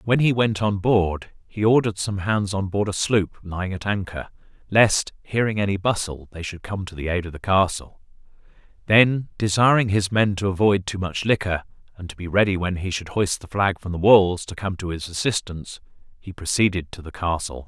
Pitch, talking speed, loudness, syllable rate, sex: 95 Hz, 205 wpm, -22 LUFS, 5.3 syllables/s, male